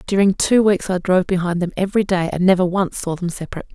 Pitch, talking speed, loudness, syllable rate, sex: 185 Hz, 240 wpm, -18 LUFS, 6.7 syllables/s, female